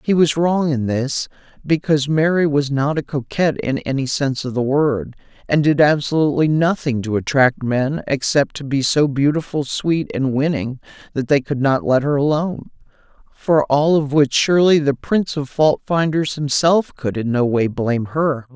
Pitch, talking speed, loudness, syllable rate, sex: 145 Hz, 180 wpm, -18 LUFS, 4.9 syllables/s, male